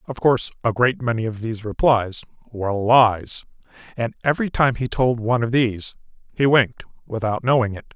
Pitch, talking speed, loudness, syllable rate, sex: 120 Hz, 175 wpm, -20 LUFS, 5.8 syllables/s, male